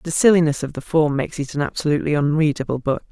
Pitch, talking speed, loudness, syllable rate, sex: 150 Hz, 210 wpm, -20 LUFS, 6.9 syllables/s, female